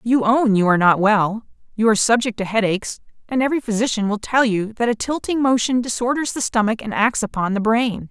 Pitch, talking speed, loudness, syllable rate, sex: 225 Hz, 215 wpm, -19 LUFS, 5.9 syllables/s, female